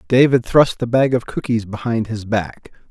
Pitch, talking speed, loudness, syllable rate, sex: 115 Hz, 185 wpm, -18 LUFS, 4.7 syllables/s, male